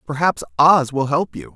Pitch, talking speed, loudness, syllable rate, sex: 140 Hz, 190 wpm, -17 LUFS, 4.7 syllables/s, male